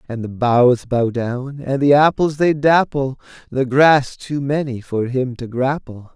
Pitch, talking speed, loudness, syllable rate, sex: 135 Hz, 175 wpm, -17 LUFS, 3.9 syllables/s, male